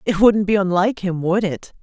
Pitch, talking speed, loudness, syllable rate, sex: 190 Hz, 230 wpm, -18 LUFS, 5.6 syllables/s, female